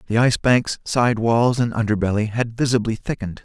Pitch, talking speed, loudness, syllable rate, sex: 115 Hz, 175 wpm, -20 LUFS, 5.6 syllables/s, male